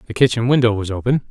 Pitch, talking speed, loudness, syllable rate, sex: 115 Hz, 230 wpm, -17 LUFS, 7.1 syllables/s, male